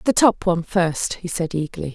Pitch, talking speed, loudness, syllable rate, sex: 175 Hz, 215 wpm, -21 LUFS, 5.5 syllables/s, female